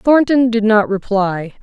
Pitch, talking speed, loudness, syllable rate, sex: 220 Hz, 150 wpm, -14 LUFS, 4.0 syllables/s, female